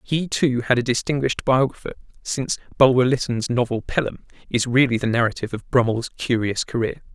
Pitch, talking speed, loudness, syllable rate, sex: 125 Hz, 160 wpm, -21 LUFS, 5.8 syllables/s, male